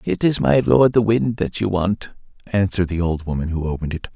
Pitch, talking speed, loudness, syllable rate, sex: 95 Hz, 230 wpm, -19 LUFS, 5.6 syllables/s, male